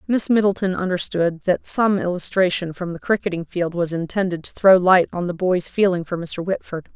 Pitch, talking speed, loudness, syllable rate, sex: 180 Hz, 190 wpm, -20 LUFS, 5.2 syllables/s, female